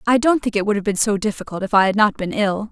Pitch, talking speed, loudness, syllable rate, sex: 210 Hz, 330 wpm, -19 LUFS, 6.6 syllables/s, female